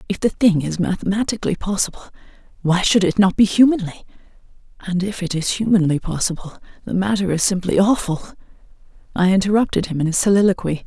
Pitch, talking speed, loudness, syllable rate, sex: 190 Hz, 155 wpm, -18 LUFS, 6.2 syllables/s, female